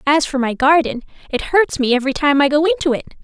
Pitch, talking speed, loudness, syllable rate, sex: 290 Hz, 240 wpm, -16 LUFS, 6.4 syllables/s, female